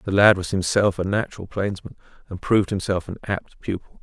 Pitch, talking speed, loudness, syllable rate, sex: 95 Hz, 195 wpm, -22 LUFS, 5.8 syllables/s, male